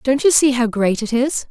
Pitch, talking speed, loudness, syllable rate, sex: 255 Hz, 280 wpm, -16 LUFS, 4.8 syllables/s, female